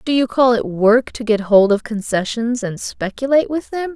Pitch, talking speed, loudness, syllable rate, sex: 235 Hz, 210 wpm, -17 LUFS, 4.9 syllables/s, female